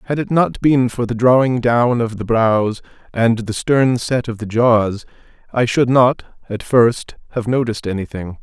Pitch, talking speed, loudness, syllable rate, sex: 120 Hz, 185 wpm, -16 LUFS, 4.4 syllables/s, male